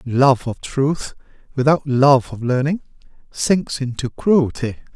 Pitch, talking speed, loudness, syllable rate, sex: 135 Hz, 120 wpm, -18 LUFS, 3.7 syllables/s, male